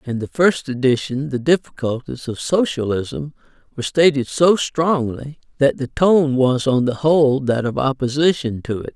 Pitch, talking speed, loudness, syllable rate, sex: 140 Hz, 160 wpm, -18 LUFS, 4.6 syllables/s, male